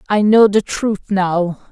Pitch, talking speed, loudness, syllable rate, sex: 200 Hz, 175 wpm, -15 LUFS, 3.5 syllables/s, female